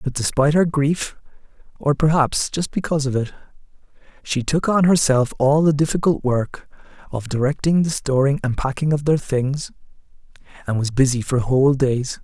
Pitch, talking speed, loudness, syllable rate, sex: 140 Hz, 160 wpm, -19 LUFS, 5.1 syllables/s, male